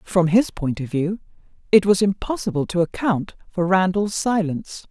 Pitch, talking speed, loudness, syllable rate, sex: 185 Hz, 160 wpm, -21 LUFS, 4.8 syllables/s, female